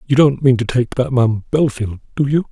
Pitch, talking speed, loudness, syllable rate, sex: 125 Hz, 240 wpm, -16 LUFS, 5.1 syllables/s, male